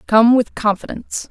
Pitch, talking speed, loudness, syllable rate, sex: 225 Hz, 140 wpm, -17 LUFS, 5.1 syllables/s, female